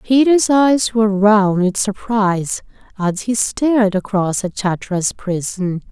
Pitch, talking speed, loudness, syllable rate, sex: 210 Hz, 130 wpm, -16 LUFS, 4.1 syllables/s, female